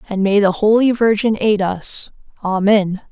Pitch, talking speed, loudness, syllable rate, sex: 205 Hz, 155 wpm, -16 LUFS, 4.4 syllables/s, female